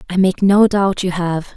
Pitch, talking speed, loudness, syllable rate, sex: 185 Hz, 230 wpm, -15 LUFS, 4.4 syllables/s, female